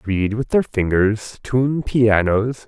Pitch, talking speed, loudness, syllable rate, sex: 115 Hz, 135 wpm, -19 LUFS, 3.2 syllables/s, male